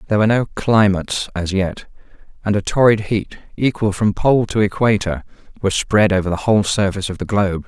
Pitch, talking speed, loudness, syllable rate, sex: 100 Hz, 190 wpm, -17 LUFS, 6.0 syllables/s, male